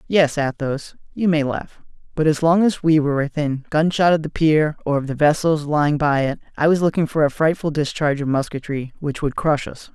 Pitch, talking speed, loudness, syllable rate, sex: 150 Hz, 215 wpm, -19 LUFS, 5.4 syllables/s, male